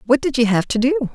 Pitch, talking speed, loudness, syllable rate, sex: 255 Hz, 315 wpm, -18 LUFS, 7.1 syllables/s, female